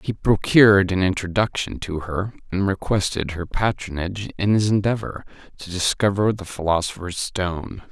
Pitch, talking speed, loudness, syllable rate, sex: 95 Hz, 135 wpm, -21 LUFS, 5.0 syllables/s, male